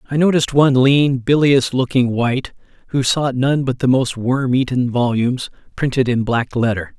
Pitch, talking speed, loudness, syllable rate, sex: 130 Hz, 170 wpm, -17 LUFS, 4.9 syllables/s, male